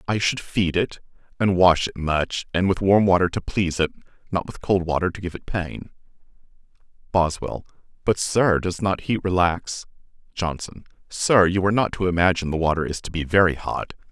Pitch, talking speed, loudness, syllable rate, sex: 90 Hz, 185 wpm, -22 LUFS, 5.3 syllables/s, male